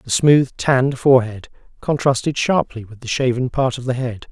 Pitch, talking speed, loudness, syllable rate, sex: 125 Hz, 180 wpm, -18 LUFS, 5.2 syllables/s, male